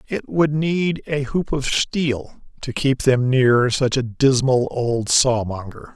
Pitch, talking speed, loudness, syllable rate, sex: 130 Hz, 160 wpm, -19 LUFS, 3.4 syllables/s, male